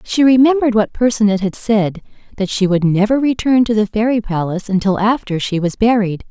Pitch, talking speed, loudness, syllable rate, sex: 215 Hz, 190 wpm, -15 LUFS, 5.7 syllables/s, female